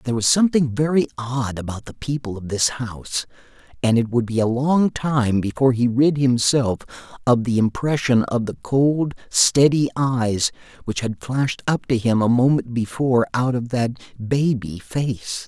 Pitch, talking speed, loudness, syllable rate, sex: 125 Hz, 170 wpm, -20 LUFS, 4.7 syllables/s, male